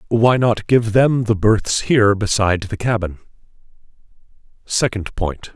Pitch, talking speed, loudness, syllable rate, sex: 110 Hz, 120 wpm, -17 LUFS, 4.4 syllables/s, male